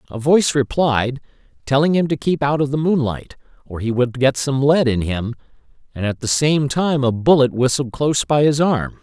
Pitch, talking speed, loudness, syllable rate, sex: 135 Hz, 205 wpm, -18 LUFS, 5.1 syllables/s, male